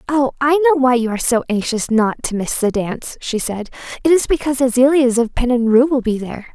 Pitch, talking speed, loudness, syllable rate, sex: 245 Hz, 220 wpm, -16 LUFS, 5.9 syllables/s, female